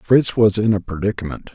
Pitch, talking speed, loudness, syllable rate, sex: 105 Hz, 195 wpm, -18 LUFS, 5.6 syllables/s, male